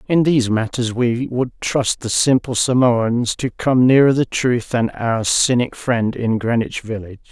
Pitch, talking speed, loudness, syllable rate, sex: 120 Hz, 170 wpm, -17 LUFS, 4.3 syllables/s, male